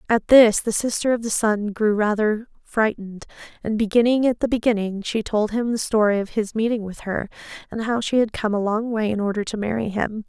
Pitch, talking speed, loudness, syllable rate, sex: 215 Hz, 220 wpm, -21 LUFS, 5.5 syllables/s, female